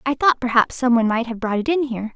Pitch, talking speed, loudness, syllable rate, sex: 245 Hz, 305 wpm, -19 LUFS, 7.0 syllables/s, female